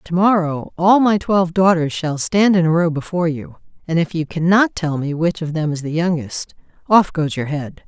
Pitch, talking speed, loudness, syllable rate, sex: 170 Hz, 220 wpm, -17 LUFS, 5.0 syllables/s, female